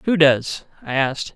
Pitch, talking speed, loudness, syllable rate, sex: 150 Hz, 175 wpm, -19 LUFS, 4.7 syllables/s, male